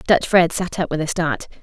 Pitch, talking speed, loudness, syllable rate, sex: 165 Hz, 260 wpm, -19 LUFS, 5.2 syllables/s, female